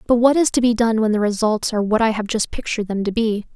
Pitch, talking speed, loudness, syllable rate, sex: 220 Hz, 305 wpm, -19 LUFS, 6.6 syllables/s, female